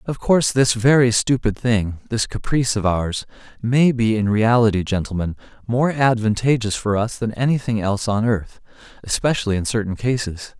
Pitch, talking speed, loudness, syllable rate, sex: 115 Hz, 160 wpm, -19 LUFS, 5.2 syllables/s, male